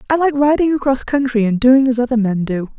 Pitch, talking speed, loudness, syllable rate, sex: 250 Hz, 235 wpm, -15 LUFS, 5.9 syllables/s, female